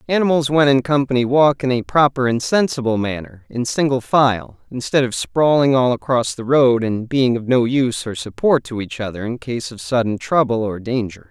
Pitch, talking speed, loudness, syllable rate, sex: 125 Hz, 200 wpm, -18 LUFS, 5.1 syllables/s, male